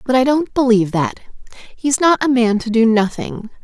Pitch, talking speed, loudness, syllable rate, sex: 240 Hz, 200 wpm, -16 LUFS, 5.0 syllables/s, female